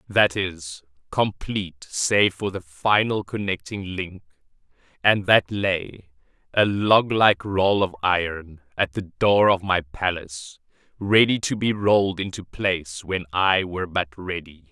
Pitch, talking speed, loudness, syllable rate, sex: 95 Hz, 140 wpm, -22 LUFS, 4.1 syllables/s, male